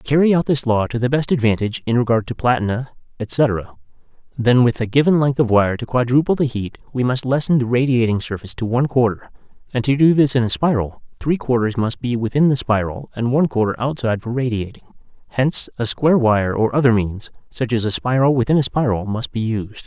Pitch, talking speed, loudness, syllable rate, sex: 120 Hz, 215 wpm, -18 LUFS, 6.0 syllables/s, male